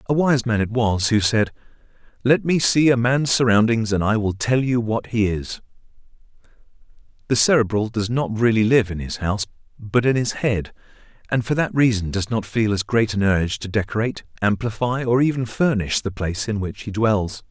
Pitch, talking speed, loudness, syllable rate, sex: 115 Hz, 195 wpm, -20 LUFS, 5.2 syllables/s, male